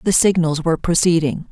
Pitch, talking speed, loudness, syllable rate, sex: 165 Hz, 160 wpm, -17 LUFS, 5.8 syllables/s, female